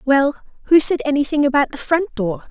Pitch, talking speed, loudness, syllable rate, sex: 280 Hz, 190 wpm, -17 LUFS, 5.8 syllables/s, female